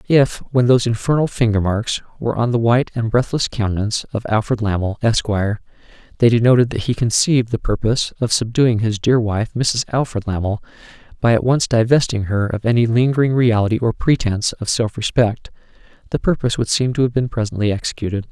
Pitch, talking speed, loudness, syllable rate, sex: 115 Hz, 180 wpm, -18 LUFS, 6.0 syllables/s, male